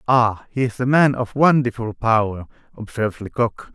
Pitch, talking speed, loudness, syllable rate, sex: 120 Hz, 145 wpm, -19 LUFS, 4.6 syllables/s, male